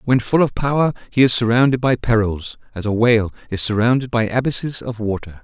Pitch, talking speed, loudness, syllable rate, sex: 115 Hz, 200 wpm, -18 LUFS, 5.8 syllables/s, male